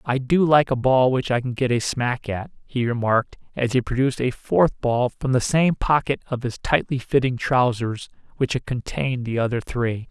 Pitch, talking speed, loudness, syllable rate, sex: 125 Hz, 210 wpm, -22 LUFS, 5.0 syllables/s, male